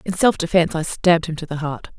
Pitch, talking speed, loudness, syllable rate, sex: 170 Hz, 270 wpm, -19 LUFS, 6.6 syllables/s, female